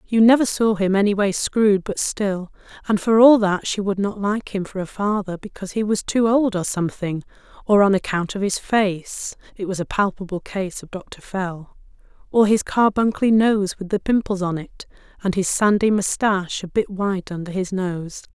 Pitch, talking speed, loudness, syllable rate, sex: 200 Hz, 200 wpm, -20 LUFS, 4.5 syllables/s, female